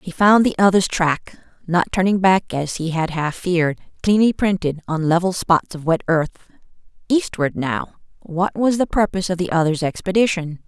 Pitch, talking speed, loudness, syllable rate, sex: 175 Hz, 170 wpm, -19 LUFS, 5.0 syllables/s, female